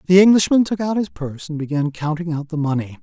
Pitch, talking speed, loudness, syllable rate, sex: 165 Hz, 240 wpm, -19 LUFS, 6.4 syllables/s, male